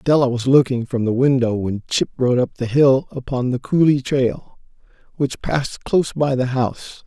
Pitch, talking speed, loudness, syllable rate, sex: 130 Hz, 185 wpm, -19 LUFS, 4.8 syllables/s, male